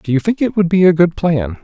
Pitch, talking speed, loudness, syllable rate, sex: 175 Hz, 330 wpm, -14 LUFS, 5.8 syllables/s, male